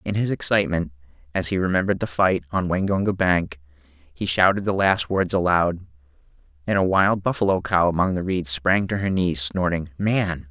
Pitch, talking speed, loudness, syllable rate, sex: 90 Hz, 175 wpm, -21 LUFS, 5.2 syllables/s, male